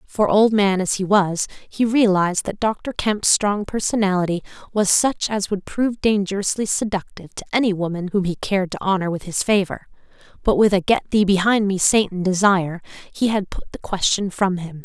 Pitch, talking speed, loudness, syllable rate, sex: 195 Hz, 190 wpm, -20 LUFS, 5.3 syllables/s, female